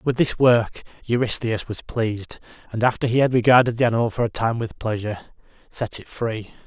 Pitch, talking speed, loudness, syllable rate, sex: 115 Hz, 190 wpm, -21 LUFS, 5.6 syllables/s, male